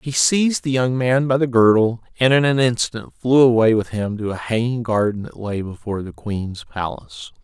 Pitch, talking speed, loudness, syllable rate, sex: 120 Hz, 210 wpm, -19 LUFS, 5.1 syllables/s, male